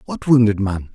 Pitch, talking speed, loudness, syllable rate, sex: 110 Hz, 190 wpm, -17 LUFS, 5.1 syllables/s, male